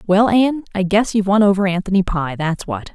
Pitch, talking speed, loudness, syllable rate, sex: 195 Hz, 225 wpm, -17 LUFS, 6.0 syllables/s, female